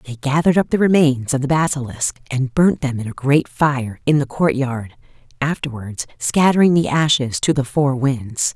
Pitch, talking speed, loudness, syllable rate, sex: 135 Hz, 180 wpm, -18 LUFS, 4.8 syllables/s, female